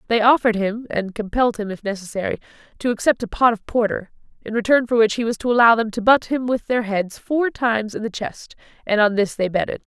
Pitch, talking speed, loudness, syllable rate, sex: 225 Hz, 235 wpm, -20 LUFS, 6.0 syllables/s, female